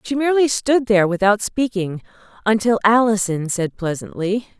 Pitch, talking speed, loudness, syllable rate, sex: 215 Hz, 130 wpm, -18 LUFS, 5.1 syllables/s, female